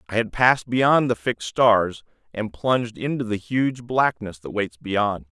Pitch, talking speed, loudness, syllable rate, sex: 110 Hz, 180 wpm, -22 LUFS, 4.4 syllables/s, male